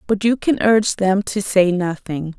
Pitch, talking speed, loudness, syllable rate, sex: 200 Hz, 200 wpm, -18 LUFS, 4.5 syllables/s, female